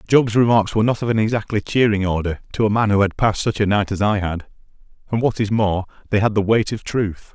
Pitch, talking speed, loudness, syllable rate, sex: 105 Hz, 255 wpm, -19 LUFS, 6.1 syllables/s, male